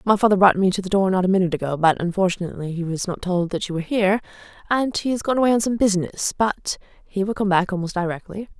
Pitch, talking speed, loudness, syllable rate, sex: 190 Hz, 250 wpm, -21 LUFS, 7.0 syllables/s, female